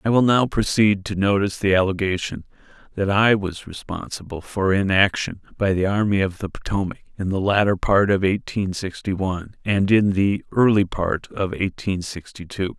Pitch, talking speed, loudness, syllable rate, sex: 100 Hz, 175 wpm, -21 LUFS, 4.9 syllables/s, male